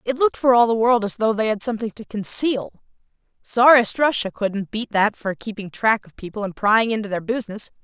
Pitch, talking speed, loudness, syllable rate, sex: 220 Hz, 215 wpm, -20 LUFS, 5.6 syllables/s, female